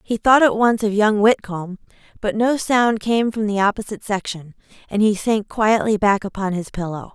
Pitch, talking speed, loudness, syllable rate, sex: 210 Hz, 195 wpm, -19 LUFS, 4.9 syllables/s, female